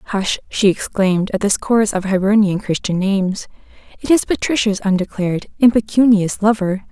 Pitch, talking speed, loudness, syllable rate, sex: 205 Hz, 140 wpm, -16 LUFS, 5.5 syllables/s, female